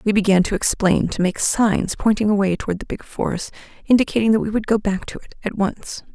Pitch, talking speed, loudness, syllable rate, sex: 205 Hz, 205 wpm, -20 LUFS, 5.8 syllables/s, female